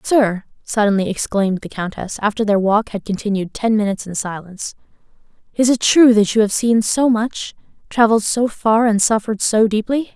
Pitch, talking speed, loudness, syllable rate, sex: 215 Hz, 175 wpm, -17 LUFS, 5.4 syllables/s, female